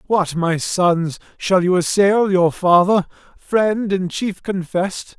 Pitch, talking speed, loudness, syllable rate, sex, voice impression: 185 Hz, 140 wpm, -18 LUFS, 3.5 syllables/s, male, very masculine, middle-aged, slightly thick, slightly powerful, unique, slightly lively, slightly intense